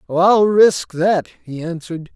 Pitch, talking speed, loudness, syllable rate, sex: 175 Hz, 140 wpm, -15 LUFS, 3.8 syllables/s, male